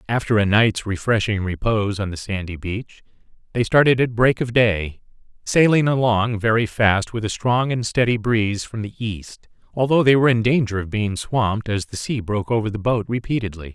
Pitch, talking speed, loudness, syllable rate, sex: 110 Hz, 190 wpm, -20 LUFS, 5.3 syllables/s, male